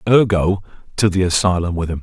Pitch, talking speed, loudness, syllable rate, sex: 95 Hz, 180 wpm, -17 LUFS, 5.9 syllables/s, male